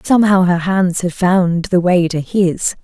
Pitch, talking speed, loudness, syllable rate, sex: 180 Hz, 190 wpm, -14 LUFS, 4.1 syllables/s, female